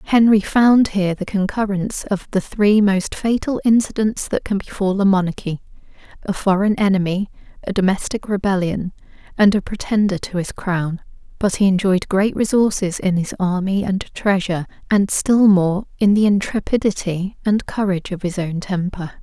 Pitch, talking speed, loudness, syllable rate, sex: 195 Hz, 155 wpm, -18 LUFS, 5.0 syllables/s, female